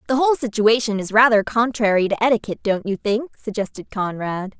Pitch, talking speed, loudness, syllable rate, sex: 220 Hz, 170 wpm, -19 LUFS, 5.8 syllables/s, female